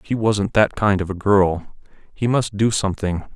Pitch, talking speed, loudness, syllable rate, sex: 100 Hz, 195 wpm, -19 LUFS, 4.6 syllables/s, male